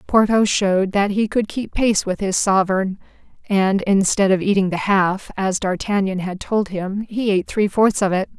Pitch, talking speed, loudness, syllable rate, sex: 195 Hz, 195 wpm, -19 LUFS, 4.7 syllables/s, female